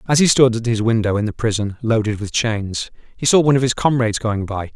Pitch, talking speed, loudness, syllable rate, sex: 115 Hz, 255 wpm, -18 LUFS, 5.9 syllables/s, male